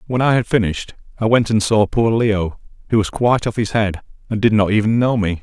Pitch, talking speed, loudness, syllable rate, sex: 110 Hz, 245 wpm, -17 LUFS, 5.9 syllables/s, male